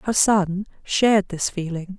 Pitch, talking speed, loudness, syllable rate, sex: 190 Hz, 150 wpm, -21 LUFS, 3.9 syllables/s, female